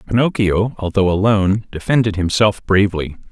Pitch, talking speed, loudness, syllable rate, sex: 100 Hz, 110 wpm, -16 LUFS, 5.4 syllables/s, male